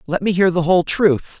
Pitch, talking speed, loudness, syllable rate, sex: 180 Hz, 255 wpm, -16 LUFS, 5.6 syllables/s, male